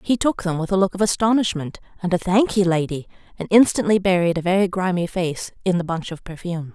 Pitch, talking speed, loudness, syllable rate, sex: 185 Hz, 220 wpm, -20 LUFS, 6.0 syllables/s, female